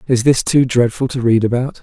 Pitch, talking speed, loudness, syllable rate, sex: 125 Hz, 230 wpm, -15 LUFS, 5.4 syllables/s, male